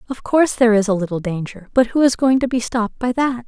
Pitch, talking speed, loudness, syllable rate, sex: 235 Hz, 275 wpm, -18 LUFS, 6.5 syllables/s, female